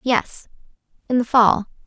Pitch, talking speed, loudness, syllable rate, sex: 235 Hz, 95 wpm, -19 LUFS, 4.0 syllables/s, female